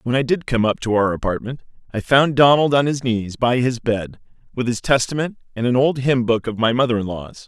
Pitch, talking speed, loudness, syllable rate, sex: 120 Hz, 240 wpm, -19 LUFS, 5.5 syllables/s, male